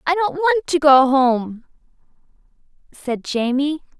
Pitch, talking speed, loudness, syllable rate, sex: 290 Hz, 120 wpm, -17 LUFS, 3.7 syllables/s, female